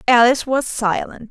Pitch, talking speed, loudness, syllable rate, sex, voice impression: 240 Hz, 140 wpm, -17 LUFS, 5.2 syllables/s, female, very feminine, slightly young, very thin, tensed, powerful, very bright, soft, clear, slightly halting, raspy, cute, intellectual, refreshing, very sincere, calm, friendly, reassuring, very unique, slightly elegant, wild, sweet, lively, slightly kind, sharp